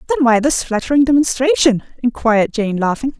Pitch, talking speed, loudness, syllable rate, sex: 245 Hz, 150 wpm, -15 LUFS, 5.8 syllables/s, female